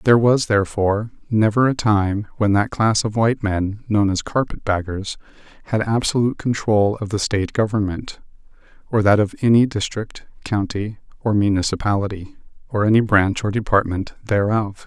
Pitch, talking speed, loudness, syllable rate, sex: 105 Hz, 150 wpm, -19 LUFS, 5.2 syllables/s, male